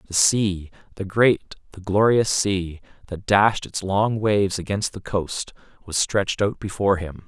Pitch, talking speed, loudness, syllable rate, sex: 100 Hz, 150 wpm, -21 LUFS, 4.3 syllables/s, male